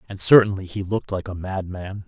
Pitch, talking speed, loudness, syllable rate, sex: 95 Hz, 205 wpm, -21 LUFS, 5.8 syllables/s, male